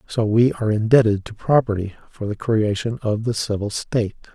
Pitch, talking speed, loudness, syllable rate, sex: 110 Hz, 180 wpm, -20 LUFS, 5.5 syllables/s, male